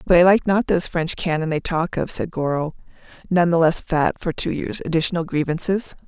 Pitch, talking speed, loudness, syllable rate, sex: 170 Hz, 205 wpm, -21 LUFS, 5.4 syllables/s, female